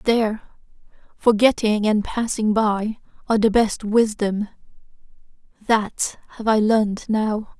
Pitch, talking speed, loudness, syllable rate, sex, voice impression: 215 Hz, 110 wpm, -20 LUFS, 4.1 syllables/s, female, feminine, slightly young, tensed, slightly powerful, slightly soft, slightly raspy, slightly refreshing, calm, friendly, reassuring, slightly lively, kind